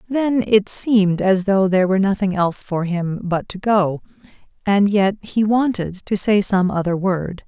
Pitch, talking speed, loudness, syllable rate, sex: 195 Hz, 175 wpm, -18 LUFS, 4.6 syllables/s, female